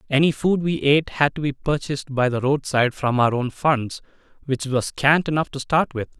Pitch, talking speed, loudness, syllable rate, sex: 140 Hz, 215 wpm, -21 LUFS, 5.5 syllables/s, male